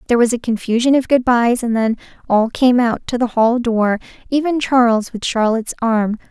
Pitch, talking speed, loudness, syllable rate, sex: 235 Hz, 200 wpm, -16 LUFS, 5.2 syllables/s, female